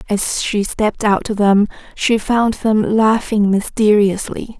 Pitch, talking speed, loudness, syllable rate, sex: 210 Hz, 145 wpm, -16 LUFS, 3.9 syllables/s, female